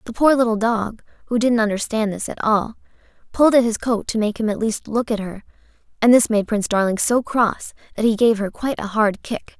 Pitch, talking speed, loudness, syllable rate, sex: 220 Hz, 230 wpm, -19 LUFS, 5.6 syllables/s, female